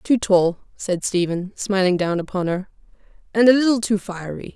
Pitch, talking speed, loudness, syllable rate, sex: 195 Hz, 170 wpm, -20 LUFS, 4.8 syllables/s, female